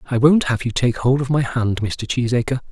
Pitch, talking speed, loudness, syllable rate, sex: 125 Hz, 245 wpm, -19 LUFS, 5.4 syllables/s, male